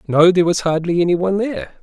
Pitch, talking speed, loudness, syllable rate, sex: 180 Hz, 230 wpm, -16 LUFS, 7.5 syllables/s, male